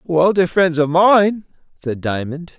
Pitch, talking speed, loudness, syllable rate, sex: 170 Hz, 165 wpm, -16 LUFS, 4.2 syllables/s, male